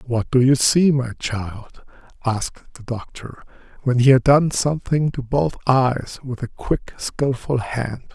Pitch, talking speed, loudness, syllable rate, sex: 130 Hz, 160 wpm, -20 LUFS, 4.0 syllables/s, male